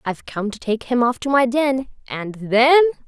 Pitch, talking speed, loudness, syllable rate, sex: 250 Hz, 215 wpm, -19 LUFS, 5.0 syllables/s, female